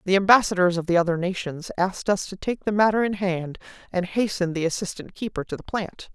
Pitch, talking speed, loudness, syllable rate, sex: 190 Hz, 215 wpm, -24 LUFS, 5.9 syllables/s, female